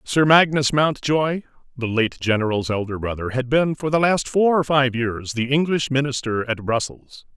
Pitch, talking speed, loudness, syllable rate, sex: 130 Hz, 180 wpm, -20 LUFS, 4.7 syllables/s, male